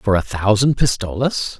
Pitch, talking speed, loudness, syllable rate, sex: 110 Hz, 150 wpm, -18 LUFS, 4.5 syllables/s, male